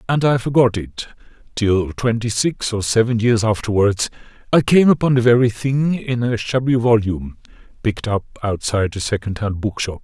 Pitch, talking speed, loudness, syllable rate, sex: 115 Hz, 165 wpm, -18 LUFS, 5.1 syllables/s, male